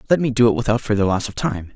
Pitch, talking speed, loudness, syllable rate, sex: 115 Hz, 305 wpm, -19 LUFS, 7.1 syllables/s, male